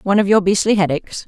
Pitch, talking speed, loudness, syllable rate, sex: 190 Hz, 285 wpm, -16 LUFS, 7.7 syllables/s, female